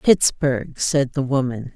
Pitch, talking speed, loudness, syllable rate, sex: 135 Hz, 135 wpm, -20 LUFS, 3.6 syllables/s, female